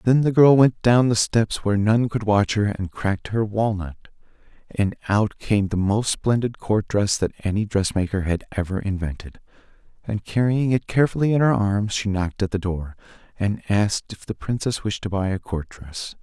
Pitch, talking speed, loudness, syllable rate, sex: 105 Hz, 195 wpm, -22 LUFS, 5.0 syllables/s, male